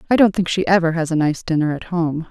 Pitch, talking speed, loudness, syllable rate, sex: 170 Hz, 285 wpm, -18 LUFS, 6.2 syllables/s, female